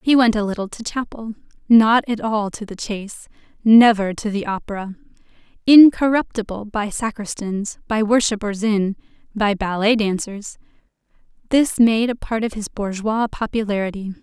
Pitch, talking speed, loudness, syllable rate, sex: 215 Hz, 140 wpm, -19 LUFS, 4.7 syllables/s, female